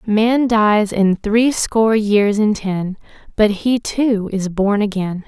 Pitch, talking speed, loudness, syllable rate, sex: 210 Hz, 160 wpm, -16 LUFS, 3.4 syllables/s, female